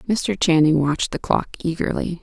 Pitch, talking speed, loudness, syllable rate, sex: 170 Hz, 160 wpm, -20 LUFS, 5.3 syllables/s, female